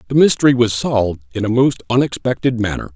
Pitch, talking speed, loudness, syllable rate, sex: 115 Hz, 185 wpm, -16 LUFS, 6.4 syllables/s, male